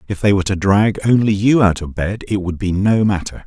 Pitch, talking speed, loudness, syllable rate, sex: 100 Hz, 260 wpm, -16 LUFS, 5.7 syllables/s, male